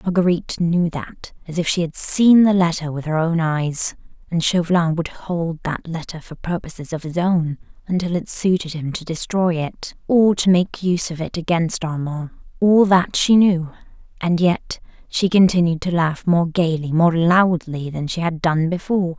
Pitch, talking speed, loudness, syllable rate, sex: 170 Hz, 185 wpm, -19 LUFS, 4.7 syllables/s, female